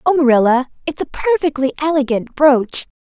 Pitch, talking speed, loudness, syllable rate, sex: 280 Hz, 140 wpm, -16 LUFS, 5.2 syllables/s, female